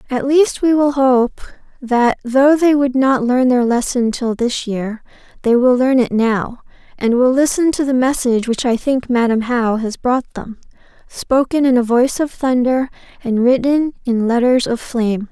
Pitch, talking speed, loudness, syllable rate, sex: 250 Hz, 185 wpm, -15 LUFS, 4.4 syllables/s, female